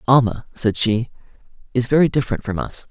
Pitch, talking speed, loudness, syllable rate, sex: 120 Hz, 165 wpm, -20 LUFS, 5.9 syllables/s, male